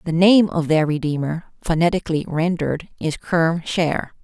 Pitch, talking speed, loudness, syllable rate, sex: 165 Hz, 140 wpm, -20 LUFS, 4.9 syllables/s, female